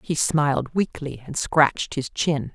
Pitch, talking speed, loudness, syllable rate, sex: 145 Hz, 165 wpm, -23 LUFS, 4.1 syllables/s, female